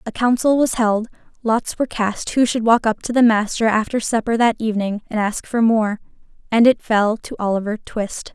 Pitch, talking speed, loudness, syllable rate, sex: 225 Hz, 200 wpm, -18 LUFS, 5.1 syllables/s, female